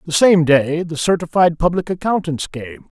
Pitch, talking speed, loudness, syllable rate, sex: 165 Hz, 160 wpm, -17 LUFS, 5.1 syllables/s, male